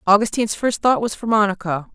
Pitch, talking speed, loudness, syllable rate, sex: 210 Hz, 185 wpm, -19 LUFS, 6.2 syllables/s, female